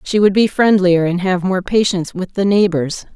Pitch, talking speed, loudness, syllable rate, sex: 190 Hz, 210 wpm, -15 LUFS, 5.0 syllables/s, female